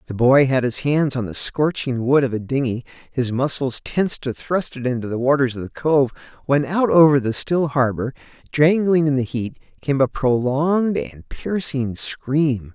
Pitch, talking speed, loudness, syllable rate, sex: 135 Hz, 190 wpm, -20 LUFS, 4.6 syllables/s, male